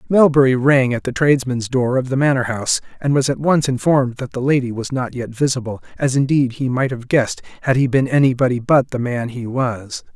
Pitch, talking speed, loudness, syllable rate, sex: 130 Hz, 220 wpm, -18 LUFS, 5.7 syllables/s, male